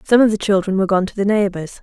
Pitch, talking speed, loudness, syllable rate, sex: 200 Hz, 295 wpm, -17 LUFS, 7.2 syllables/s, female